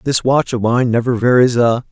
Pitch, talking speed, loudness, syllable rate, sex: 120 Hz, 220 wpm, -14 LUFS, 5.1 syllables/s, male